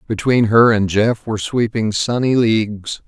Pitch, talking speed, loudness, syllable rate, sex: 110 Hz, 155 wpm, -16 LUFS, 4.5 syllables/s, male